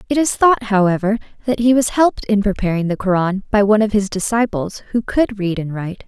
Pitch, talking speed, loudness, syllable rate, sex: 210 Hz, 215 wpm, -17 LUFS, 5.9 syllables/s, female